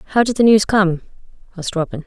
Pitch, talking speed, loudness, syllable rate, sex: 195 Hz, 205 wpm, -16 LUFS, 6.1 syllables/s, female